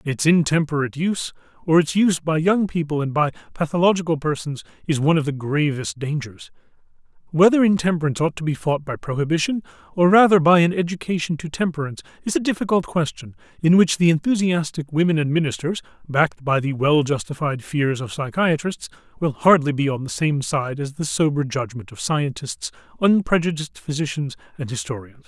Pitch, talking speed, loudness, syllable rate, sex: 155 Hz, 165 wpm, -21 LUFS, 5.8 syllables/s, male